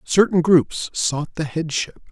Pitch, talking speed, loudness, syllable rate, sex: 165 Hz, 140 wpm, -20 LUFS, 3.7 syllables/s, male